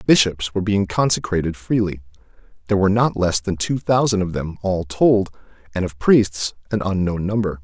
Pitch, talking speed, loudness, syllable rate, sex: 100 Hz, 175 wpm, -20 LUFS, 5.4 syllables/s, male